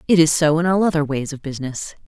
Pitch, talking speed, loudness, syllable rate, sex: 155 Hz, 260 wpm, -19 LUFS, 6.6 syllables/s, female